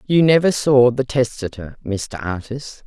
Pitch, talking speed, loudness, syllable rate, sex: 125 Hz, 145 wpm, -18 LUFS, 4.1 syllables/s, female